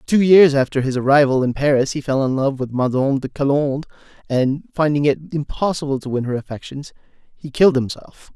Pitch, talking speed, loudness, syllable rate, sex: 140 Hz, 185 wpm, -18 LUFS, 5.9 syllables/s, male